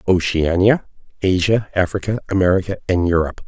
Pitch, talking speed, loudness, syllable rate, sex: 95 Hz, 105 wpm, -18 LUFS, 6.3 syllables/s, male